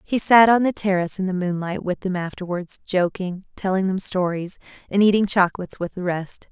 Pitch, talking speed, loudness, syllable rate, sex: 190 Hz, 195 wpm, -21 LUFS, 5.6 syllables/s, female